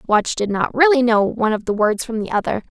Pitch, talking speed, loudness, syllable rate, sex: 230 Hz, 260 wpm, -18 LUFS, 5.8 syllables/s, female